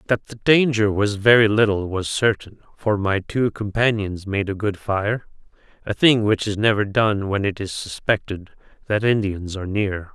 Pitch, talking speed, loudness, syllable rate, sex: 105 Hz, 170 wpm, -20 LUFS, 4.6 syllables/s, male